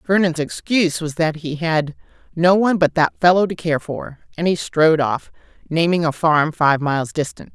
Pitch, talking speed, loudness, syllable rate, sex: 160 Hz, 190 wpm, -18 LUFS, 5.1 syllables/s, female